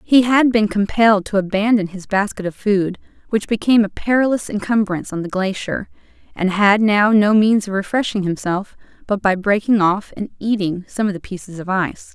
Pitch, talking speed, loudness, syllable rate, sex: 205 Hz, 190 wpm, -18 LUFS, 5.3 syllables/s, female